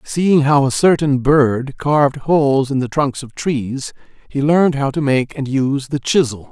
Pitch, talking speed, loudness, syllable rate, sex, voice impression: 140 Hz, 195 wpm, -16 LUFS, 4.5 syllables/s, male, very masculine, very adult-like, very middle-aged, very thick, tensed, slightly powerful, slightly bright, slightly hard, very clear, fluent, cool, very intellectual, slightly refreshing, sincere, calm, friendly, very reassuring, unique, slightly elegant, wild, sweet, slightly lively, very kind